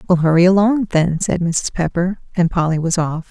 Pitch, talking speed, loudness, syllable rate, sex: 175 Hz, 200 wpm, -17 LUFS, 5.1 syllables/s, female